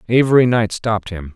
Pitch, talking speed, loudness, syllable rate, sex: 110 Hz, 180 wpm, -16 LUFS, 6.0 syllables/s, male